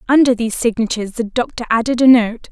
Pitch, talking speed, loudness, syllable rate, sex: 235 Hz, 190 wpm, -15 LUFS, 6.6 syllables/s, female